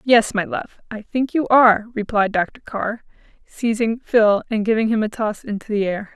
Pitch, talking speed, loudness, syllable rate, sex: 220 Hz, 195 wpm, -19 LUFS, 4.6 syllables/s, female